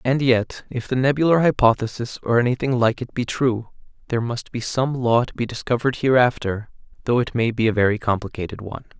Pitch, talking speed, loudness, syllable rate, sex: 120 Hz, 195 wpm, -21 LUFS, 5.9 syllables/s, male